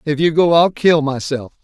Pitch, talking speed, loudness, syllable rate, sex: 155 Hz, 220 wpm, -15 LUFS, 4.8 syllables/s, male